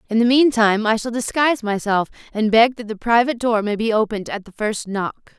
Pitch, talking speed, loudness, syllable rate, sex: 225 Hz, 235 wpm, -19 LUFS, 5.7 syllables/s, female